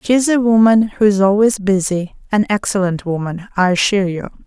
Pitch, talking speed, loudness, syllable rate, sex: 200 Hz, 190 wpm, -15 LUFS, 5.5 syllables/s, female